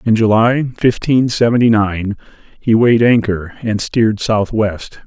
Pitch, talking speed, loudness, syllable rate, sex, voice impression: 110 Hz, 130 wpm, -14 LUFS, 4.4 syllables/s, male, very masculine, slightly old, thick, muffled, calm, friendly, reassuring, elegant, slightly kind